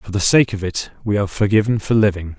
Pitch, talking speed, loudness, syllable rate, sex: 100 Hz, 250 wpm, -17 LUFS, 6.3 syllables/s, male